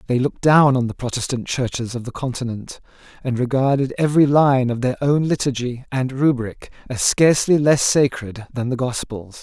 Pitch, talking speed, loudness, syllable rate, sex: 130 Hz, 170 wpm, -19 LUFS, 5.2 syllables/s, male